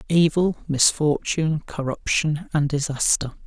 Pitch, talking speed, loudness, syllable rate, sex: 150 Hz, 85 wpm, -22 LUFS, 4.2 syllables/s, male